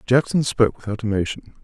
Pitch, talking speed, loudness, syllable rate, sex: 115 Hz, 145 wpm, -21 LUFS, 6.2 syllables/s, male